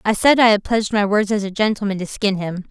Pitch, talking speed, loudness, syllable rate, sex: 205 Hz, 290 wpm, -18 LUFS, 6.2 syllables/s, female